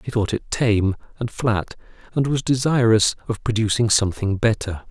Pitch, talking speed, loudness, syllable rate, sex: 110 Hz, 160 wpm, -21 LUFS, 5.0 syllables/s, male